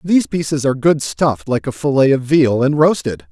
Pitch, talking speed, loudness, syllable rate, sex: 140 Hz, 215 wpm, -15 LUFS, 5.6 syllables/s, male